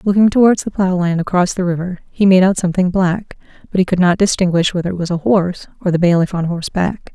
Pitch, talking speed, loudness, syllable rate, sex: 180 Hz, 235 wpm, -15 LUFS, 6.4 syllables/s, female